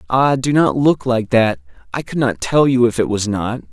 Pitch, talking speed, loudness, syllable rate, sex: 120 Hz, 240 wpm, -16 LUFS, 4.8 syllables/s, male